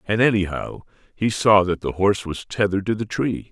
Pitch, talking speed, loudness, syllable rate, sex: 100 Hz, 205 wpm, -21 LUFS, 5.5 syllables/s, male